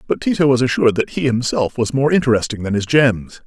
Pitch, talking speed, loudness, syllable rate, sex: 125 Hz, 225 wpm, -17 LUFS, 6.0 syllables/s, male